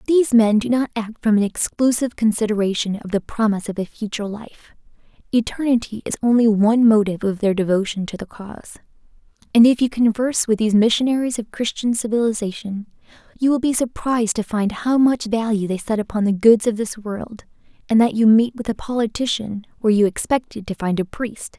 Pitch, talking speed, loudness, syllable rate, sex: 220 Hz, 190 wpm, -19 LUFS, 5.9 syllables/s, female